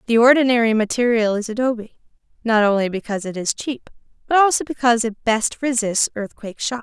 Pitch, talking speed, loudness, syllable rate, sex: 230 Hz, 165 wpm, -19 LUFS, 6.0 syllables/s, female